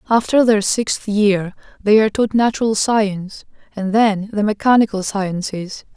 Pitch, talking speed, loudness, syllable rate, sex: 210 Hz, 140 wpm, -17 LUFS, 4.5 syllables/s, female